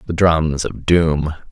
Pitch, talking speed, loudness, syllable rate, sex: 80 Hz, 160 wpm, -17 LUFS, 3.3 syllables/s, male